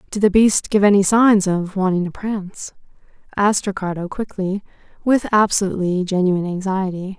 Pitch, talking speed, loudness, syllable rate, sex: 195 Hz, 140 wpm, -18 LUFS, 5.5 syllables/s, female